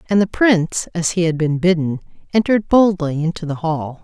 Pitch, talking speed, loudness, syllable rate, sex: 170 Hz, 195 wpm, -17 LUFS, 5.5 syllables/s, female